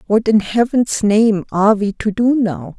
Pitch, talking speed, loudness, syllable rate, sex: 215 Hz, 195 wpm, -15 LUFS, 4.3 syllables/s, female